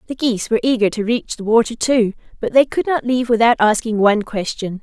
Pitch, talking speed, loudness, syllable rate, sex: 230 Hz, 225 wpm, -17 LUFS, 6.3 syllables/s, female